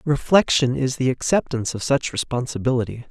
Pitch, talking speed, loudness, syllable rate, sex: 130 Hz, 135 wpm, -21 LUFS, 5.7 syllables/s, male